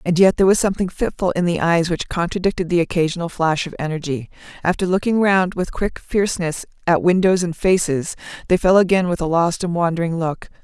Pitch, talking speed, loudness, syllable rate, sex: 175 Hz, 200 wpm, -19 LUFS, 5.9 syllables/s, female